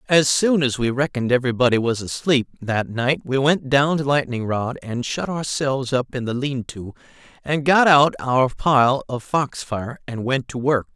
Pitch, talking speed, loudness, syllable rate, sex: 130 Hz, 195 wpm, -20 LUFS, 4.7 syllables/s, male